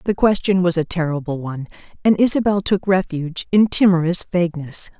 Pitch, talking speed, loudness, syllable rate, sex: 180 Hz, 155 wpm, -18 LUFS, 5.8 syllables/s, female